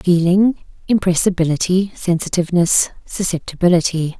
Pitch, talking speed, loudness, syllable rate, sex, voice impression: 175 Hz, 55 wpm, -17 LUFS, 5.2 syllables/s, female, very feminine, slightly young, slightly adult-like, very thin, tensed, slightly powerful, bright, soft, clear, fluent, slightly raspy, cute, intellectual, refreshing, slightly sincere, very calm, friendly, reassuring, slightly unique, very elegant, sweet, slightly lively, kind, slightly modest, slightly light